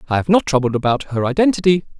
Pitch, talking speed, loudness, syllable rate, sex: 150 Hz, 210 wpm, -17 LUFS, 7.1 syllables/s, male